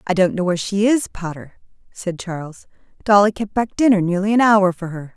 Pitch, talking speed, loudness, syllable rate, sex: 195 Hz, 210 wpm, -18 LUFS, 5.5 syllables/s, female